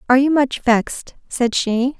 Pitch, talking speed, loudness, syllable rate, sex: 255 Hz, 180 wpm, -17 LUFS, 4.8 syllables/s, female